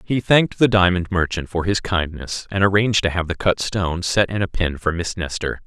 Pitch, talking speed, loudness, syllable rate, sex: 95 Hz, 235 wpm, -20 LUFS, 5.4 syllables/s, male